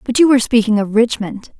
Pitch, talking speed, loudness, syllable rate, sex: 230 Hz, 225 wpm, -14 LUFS, 6.1 syllables/s, female